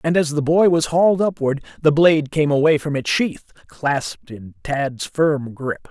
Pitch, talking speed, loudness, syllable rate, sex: 150 Hz, 195 wpm, -19 LUFS, 4.6 syllables/s, male